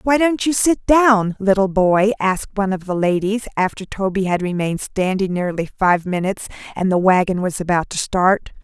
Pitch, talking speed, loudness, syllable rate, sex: 195 Hz, 190 wpm, -18 LUFS, 5.2 syllables/s, female